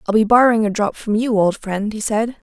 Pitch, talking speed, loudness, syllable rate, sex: 215 Hz, 260 wpm, -17 LUFS, 5.8 syllables/s, female